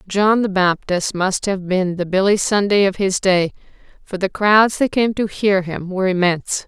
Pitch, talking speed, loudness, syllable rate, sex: 195 Hz, 200 wpm, -17 LUFS, 4.7 syllables/s, female